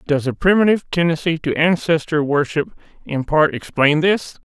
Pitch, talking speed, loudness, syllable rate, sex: 160 Hz, 150 wpm, -18 LUFS, 5.0 syllables/s, male